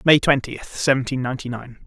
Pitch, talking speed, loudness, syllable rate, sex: 130 Hz, 160 wpm, -21 LUFS, 5.7 syllables/s, male